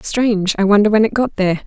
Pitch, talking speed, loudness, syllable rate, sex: 210 Hz, 215 wpm, -15 LUFS, 6.5 syllables/s, female